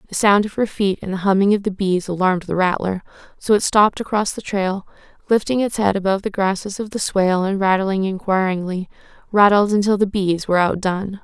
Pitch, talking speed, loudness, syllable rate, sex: 195 Hz, 200 wpm, -18 LUFS, 5.9 syllables/s, female